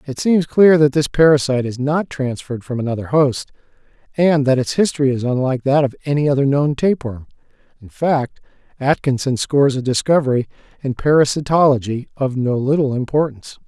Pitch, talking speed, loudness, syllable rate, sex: 135 Hz, 155 wpm, -17 LUFS, 5.8 syllables/s, male